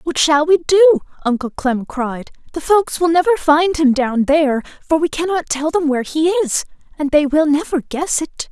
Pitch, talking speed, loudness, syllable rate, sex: 305 Hz, 210 wpm, -16 LUFS, 4.8 syllables/s, female